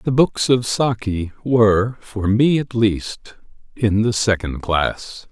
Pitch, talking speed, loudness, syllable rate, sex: 110 Hz, 145 wpm, -18 LUFS, 3.5 syllables/s, male